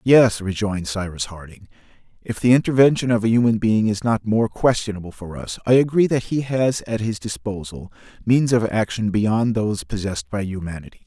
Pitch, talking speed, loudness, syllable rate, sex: 110 Hz, 180 wpm, -20 LUFS, 5.4 syllables/s, male